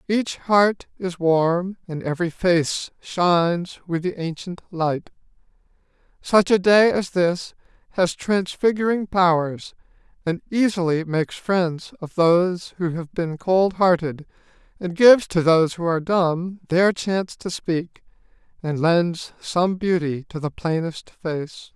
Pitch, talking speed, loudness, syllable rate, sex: 175 Hz, 140 wpm, -21 LUFS, 3.9 syllables/s, male